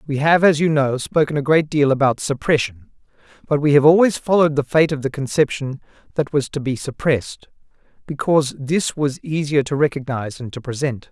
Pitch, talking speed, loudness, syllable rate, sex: 145 Hz, 190 wpm, -19 LUFS, 5.6 syllables/s, male